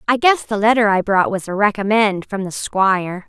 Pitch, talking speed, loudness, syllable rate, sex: 205 Hz, 220 wpm, -17 LUFS, 5.1 syllables/s, female